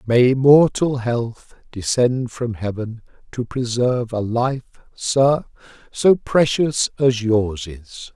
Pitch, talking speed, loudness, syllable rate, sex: 120 Hz, 120 wpm, -19 LUFS, 3.4 syllables/s, male